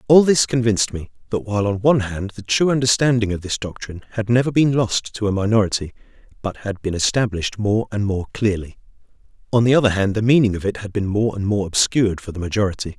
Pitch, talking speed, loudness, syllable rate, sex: 105 Hz, 215 wpm, -19 LUFS, 6.4 syllables/s, male